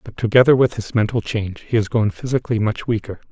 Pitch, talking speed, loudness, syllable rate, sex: 115 Hz, 215 wpm, -19 LUFS, 6.5 syllables/s, male